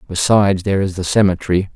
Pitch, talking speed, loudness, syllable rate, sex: 95 Hz, 170 wpm, -16 LUFS, 7.1 syllables/s, male